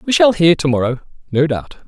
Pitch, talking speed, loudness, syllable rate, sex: 165 Hz, 225 wpm, -15 LUFS, 5.6 syllables/s, male